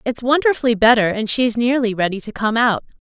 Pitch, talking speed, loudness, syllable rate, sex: 235 Hz, 200 wpm, -17 LUFS, 5.8 syllables/s, female